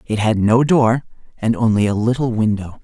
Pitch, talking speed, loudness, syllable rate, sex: 115 Hz, 190 wpm, -17 LUFS, 5.0 syllables/s, male